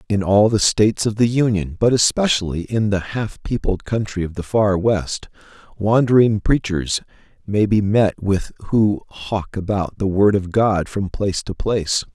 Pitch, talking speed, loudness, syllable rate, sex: 100 Hz, 175 wpm, -19 LUFS, 4.5 syllables/s, male